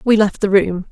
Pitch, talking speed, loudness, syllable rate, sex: 200 Hz, 265 wpm, -15 LUFS, 5.0 syllables/s, female